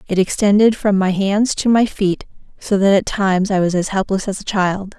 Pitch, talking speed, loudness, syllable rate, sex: 195 Hz, 230 wpm, -16 LUFS, 5.1 syllables/s, female